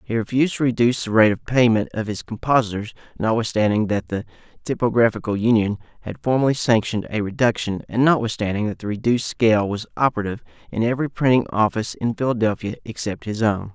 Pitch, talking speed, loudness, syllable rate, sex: 115 Hz, 165 wpm, -21 LUFS, 6.6 syllables/s, male